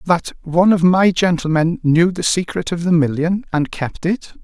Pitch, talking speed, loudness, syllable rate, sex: 170 Hz, 190 wpm, -17 LUFS, 4.7 syllables/s, male